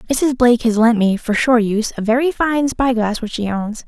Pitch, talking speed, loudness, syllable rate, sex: 235 Hz, 230 wpm, -16 LUFS, 5.5 syllables/s, female